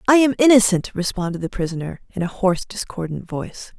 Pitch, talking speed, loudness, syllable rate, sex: 195 Hz, 175 wpm, -20 LUFS, 6.2 syllables/s, female